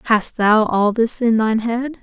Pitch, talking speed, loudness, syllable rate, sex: 225 Hz, 205 wpm, -17 LUFS, 4.4 syllables/s, female